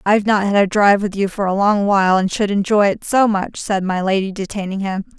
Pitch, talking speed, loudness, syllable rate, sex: 200 Hz, 255 wpm, -17 LUFS, 5.9 syllables/s, female